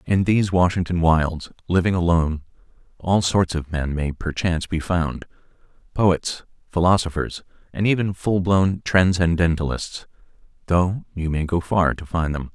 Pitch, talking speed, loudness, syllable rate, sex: 85 Hz, 135 wpm, -21 LUFS, 4.6 syllables/s, male